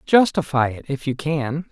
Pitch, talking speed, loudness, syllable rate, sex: 150 Hz, 175 wpm, -21 LUFS, 4.5 syllables/s, male